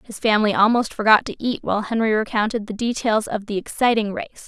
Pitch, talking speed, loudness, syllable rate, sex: 220 Hz, 200 wpm, -20 LUFS, 6.0 syllables/s, female